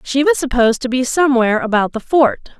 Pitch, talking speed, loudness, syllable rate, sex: 260 Hz, 210 wpm, -15 LUFS, 6.5 syllables/s, female